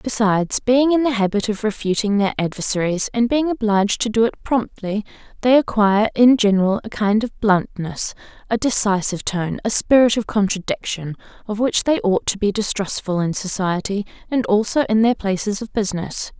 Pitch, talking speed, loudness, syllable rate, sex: 210 Hz, 170 wpm, -19 LUFS, 5.3 syllables/s, female